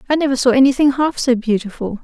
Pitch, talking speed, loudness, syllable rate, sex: 255 Hz, 205 wpm, -15 LUFS, 6.6 syllables/s, female